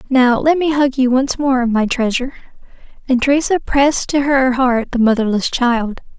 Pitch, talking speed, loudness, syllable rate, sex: 260 Hz, 175 wpm, -15 LUFS, 4.9 syllables/s, female